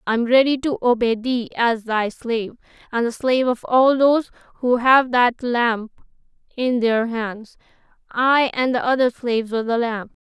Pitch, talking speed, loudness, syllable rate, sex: 240 Hz, 175 wpm, -19 LUFS, 4.7 syllables/s, female